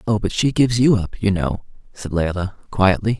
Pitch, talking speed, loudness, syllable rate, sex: 100 Hz, 205 wpm, -19 LUFS, 5.3 syllables/s, male